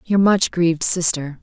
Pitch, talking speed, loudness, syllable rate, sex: 175 Hz, 170 wpm, -17 LUFS, 4.5 syllables/s, female